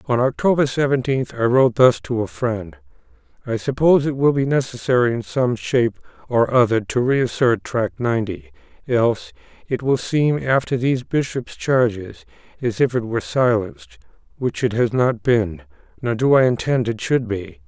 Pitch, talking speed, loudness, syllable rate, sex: 125 Hz, 170 wpm, -19 LUFS, 5.0 syllables/s, male